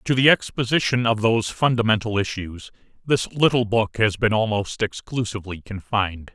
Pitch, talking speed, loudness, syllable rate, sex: 110 Hz, 140 wpm, -21 LUFS, 5.3 syllables/s, male